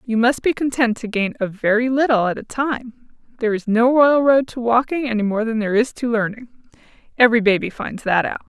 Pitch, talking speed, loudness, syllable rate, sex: 235 Hz, 215 wpm, -18 LUFS, 5.6 syllables/s, female